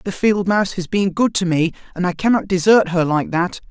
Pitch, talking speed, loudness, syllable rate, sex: 185 Hz, 245 wpm, -18 LUFS, 5.4 syllables/s, male